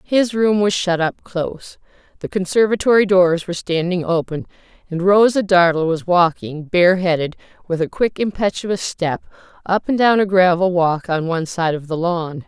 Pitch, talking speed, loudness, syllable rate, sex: 180 Hz, 170 wpm, -17 LUFS, 4.9 syllables/s, female